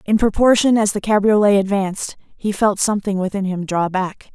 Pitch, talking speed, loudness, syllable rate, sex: 200 Hz, 180 wpm, -17 LUFS, 5.3 syllables/s, female